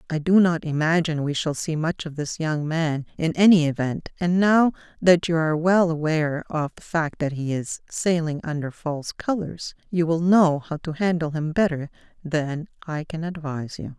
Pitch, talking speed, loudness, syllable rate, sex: 160 Hz, 195 wpm, -23 LUFS, 4.9 syllables/s, female